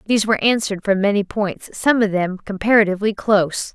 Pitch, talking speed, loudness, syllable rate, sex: 205 Hz, 175 wpm, -18 LUFS, 6.3 syllables/s, female